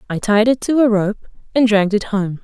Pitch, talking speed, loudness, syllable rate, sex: 215 Hz, 245 wpm, -16 LUFS, 5.9 syllables/s, female